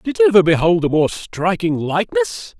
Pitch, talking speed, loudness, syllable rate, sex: 160 Hz, 185 wpm, -16 LUFS, 5.1 syllables/s, male